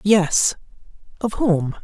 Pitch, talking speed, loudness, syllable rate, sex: 190 Hz, 100 wpm, -19 LUFS, 2.9 syllables/s, male